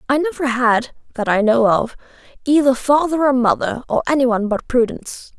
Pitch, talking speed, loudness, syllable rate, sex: 255 Hz, 180 wpm, -17 LUFS, 5.5 syllables/s, female